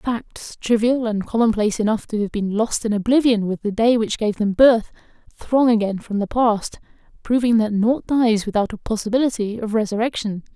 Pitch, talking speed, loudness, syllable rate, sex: 220 Hz, 180 wpm, -19 LUFS, 5.1 syllables/s, female